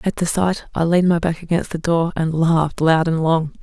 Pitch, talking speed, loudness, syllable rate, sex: 165 Hz, 250 wpm, -18 LUFS, 5.4 syllables/s, female